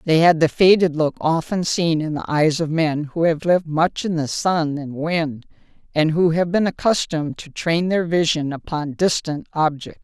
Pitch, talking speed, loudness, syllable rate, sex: 160 Hz, 195 wpm, -20 LUFS, 4.6 syllables/s, female